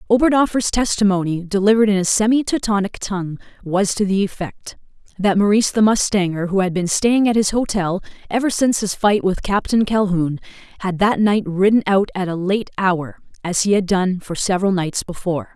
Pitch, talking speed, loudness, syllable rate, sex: 200 Hz, 175 wpm, -18 LUFS, 5.5 syllables/s, female